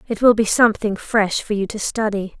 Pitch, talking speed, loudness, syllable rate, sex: 210 Hz, 225 wpm, -18 LUFS, 5.3 syllables/s, female